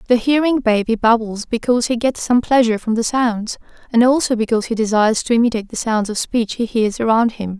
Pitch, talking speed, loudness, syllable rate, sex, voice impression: 230 Hz, 215 wpm, -17 LUFS, 6.1 syllables/s, female, feminine, slightly gender-neutral, adult-like, tensed, powerful, slightly bright, slightly clear, fluent, raspy, slightly intellectual, slightly friendly, elegant, lively, sharp